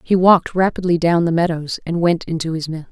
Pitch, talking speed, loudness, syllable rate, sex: 170 Hz, 225 wpm, -17 LUFS, 5.8 syllables/s, female